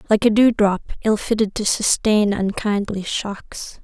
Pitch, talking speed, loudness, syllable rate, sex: 210 Hz, 155 wpm, -19 LUFS, 4.1 syllables/s, female